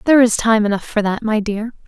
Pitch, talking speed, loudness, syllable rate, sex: 220 Hz, 255 wpm, -17 LUFS, 6.1 syllables/s, female